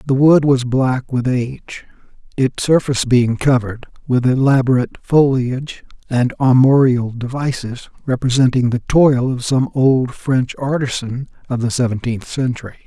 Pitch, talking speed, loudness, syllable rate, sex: 130 Hz, 130 wpm, -16 LUFS, 4.8 syllables/s, male